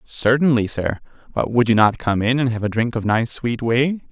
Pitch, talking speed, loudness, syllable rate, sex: 120 Hz, 235 wpm, -19 LUFS, 5.0 syllables/s, male